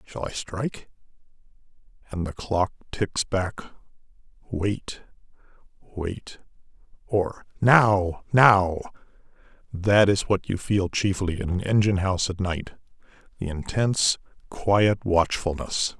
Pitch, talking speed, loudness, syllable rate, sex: 95 Hz, 105 wpm, -24 LUFS, 3.9 syllables/s, male